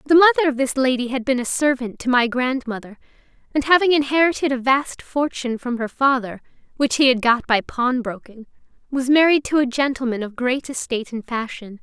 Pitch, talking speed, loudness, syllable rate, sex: 260 Hz, 195 wpm, -19 LUFS, 5.6 syllables/s, female